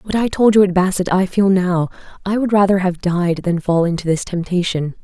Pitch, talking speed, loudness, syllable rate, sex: 185 Hz, 225 wpm, -17 LUFS, 5.2 syllables/s, female